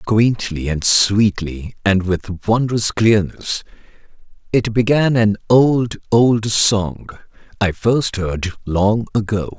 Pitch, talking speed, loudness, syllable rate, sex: 105 Hz, 115 wpm, -17 LUFS, 3.2 syllables/s, male